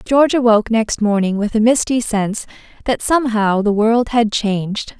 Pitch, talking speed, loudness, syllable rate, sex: 225 Hz, 170 wpm, -16 LUFS, 5.1 syllables/s, female